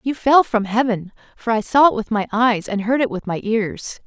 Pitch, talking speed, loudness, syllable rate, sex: 225 Hz, 250 wpm, -18 LUFS, 5.0 syllables/s, female